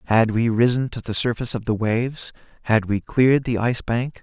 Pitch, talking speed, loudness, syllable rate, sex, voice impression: 115 Hz, 215 wpm, -21 LUFS, 5.7 syllables/s, male, masculine, adult-like, slightly thick, cool, slightly refreshing, sincere, friendly